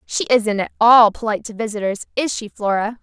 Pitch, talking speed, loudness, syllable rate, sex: 220 Hz, 200 wpm, -18 LUFS, 5.5 syllables/s, female